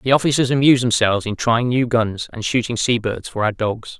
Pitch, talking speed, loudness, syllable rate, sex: 120 Hz, 225 wpm, -18 LUFS, 5.7 syllables/s, male